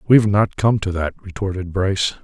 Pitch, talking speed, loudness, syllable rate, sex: 95 Hz, 190 wpm, -19 LUFS, 5.5 syllables/s, male